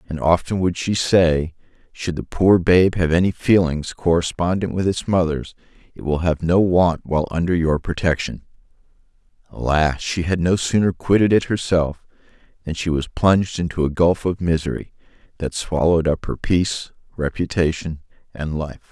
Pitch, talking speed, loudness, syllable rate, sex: 85 Hz, 160 wpm, -20 LUFS, 4.9 syllables/s, male